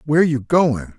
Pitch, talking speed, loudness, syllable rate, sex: 135 Hz, 185 wpm, -17 LUFS, 4.8 syllables/s, male